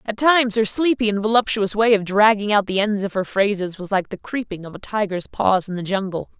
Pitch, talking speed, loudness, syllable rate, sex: 205 Hz, 245 wpm, -20 LUFS, 5.6 syllables/s, female